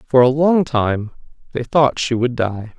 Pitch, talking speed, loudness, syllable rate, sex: 130 Hz, 195 wpm, -17 LUFS, 4.1 syllables/s, male